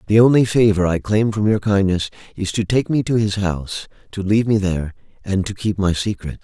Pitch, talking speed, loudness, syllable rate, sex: 100 Hz, 225 wpm, -18 LUFS, 5.7 syllables/s, male